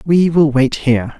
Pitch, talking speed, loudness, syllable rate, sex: 145 Hz, 200 wpm, -14 LUFS, 4.7 syllables/s, male